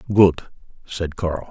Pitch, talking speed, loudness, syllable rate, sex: 85 Hz, 120 wpm, -20 LUFS, 4.6 syllables/s, male